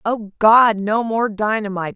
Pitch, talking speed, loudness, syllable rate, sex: 215 Hz, 155 wpm, -17 LUFS, 4.4 syllables/s, female